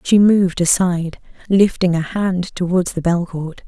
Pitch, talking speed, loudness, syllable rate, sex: 180 Hz, 165 wpm, -17 LUFS, 4.6 syllables/s, female